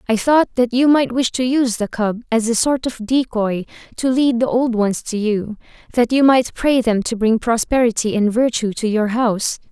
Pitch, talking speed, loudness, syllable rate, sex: 235 Hz, 215 wpm, -17 LUFS, 4.9 syllables/s, female